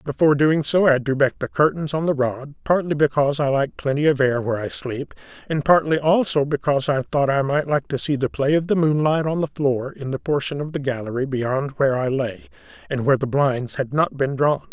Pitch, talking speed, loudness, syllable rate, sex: 140 Hz, 235 wpm, -21 LUFS, 5.6 syllables/s, male